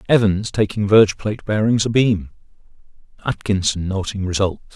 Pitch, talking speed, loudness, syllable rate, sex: 105 Hz, 115 wpm, -19 LUFS, 5.4 syllables/s, male